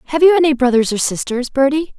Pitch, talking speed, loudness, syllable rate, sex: 275 Hz, 210 wpm, -15 LUFS, 6.4 syllables/s, female